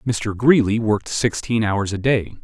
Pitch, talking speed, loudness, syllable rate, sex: 110 Hz, 170 wpm, -19 LUFS, 4.3 syllables/s, male